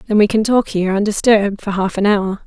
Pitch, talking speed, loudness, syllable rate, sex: 205 Hz, 245 wpm, -16 LUFS, 6.2 syllables/s, female